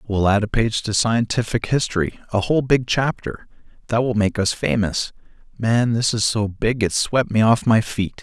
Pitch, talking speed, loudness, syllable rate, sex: 110 Hz, 180 wpm, -20 LUFS, 4.9 syllables/s, male